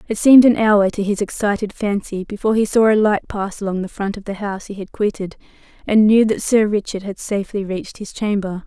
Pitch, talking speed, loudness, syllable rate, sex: 205 Hz, 230 wpm, -18 LUFS, 5.9 syllables/s, female